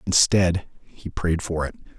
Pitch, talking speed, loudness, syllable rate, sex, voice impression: 85 Hz, 150 wpm, -23 LUFS, 4.1 syllables/s, male, very masculine, adult-like, thick, cool, slightly calm, slightly elegant, slightly wild